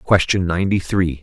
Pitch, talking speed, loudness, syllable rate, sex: 90 Hz, 145 wpm, -18 LUFS, 5.0 syllables/s, male